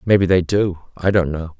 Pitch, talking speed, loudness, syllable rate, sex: 90 Hz, 225 wpm, -18 LUFS, 5.1 syllables/s, male